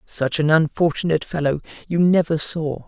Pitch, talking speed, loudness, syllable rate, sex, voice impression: 160 Hz, 145 wpm, -20 LUFS, 5.2 syllables/s, male, masculine, adult-like, slightly tensed, slightly unique, slightly intense